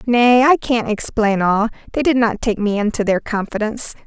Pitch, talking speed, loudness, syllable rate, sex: 225 Hz, 190 wpm, -17 LUFS, 5.0 syllables/s, female